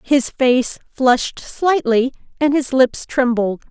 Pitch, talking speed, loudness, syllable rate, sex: 260 Hz, 130 wpm, -17 LUFS, 3.5 syllables/s, female